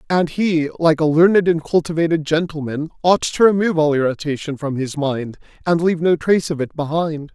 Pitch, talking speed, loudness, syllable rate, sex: 160 Hz, 190 wpm, -18 LUFS, 5.6 syllables/s, male